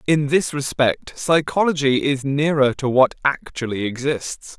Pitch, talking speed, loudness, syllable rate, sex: 140 Hz, 130 wpm, -20 LUFS, 4.2 syllables/s, male